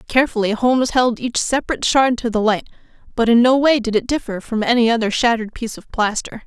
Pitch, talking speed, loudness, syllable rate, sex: 235 Hz, 215 wpm, -17 LUFS, 6.4 syllables/s, female